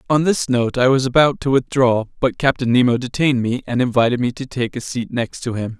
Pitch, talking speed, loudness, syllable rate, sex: 125 Hz, 240 wpm, -18 LUFS, 5.7 syllables/s, male